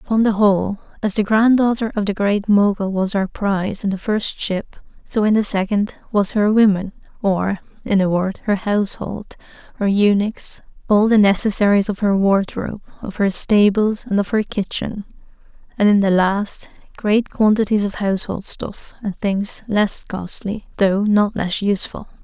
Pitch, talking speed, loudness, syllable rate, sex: 205 Hz, 165 wpm, -18 LUFS, 4.7 syllables/s, female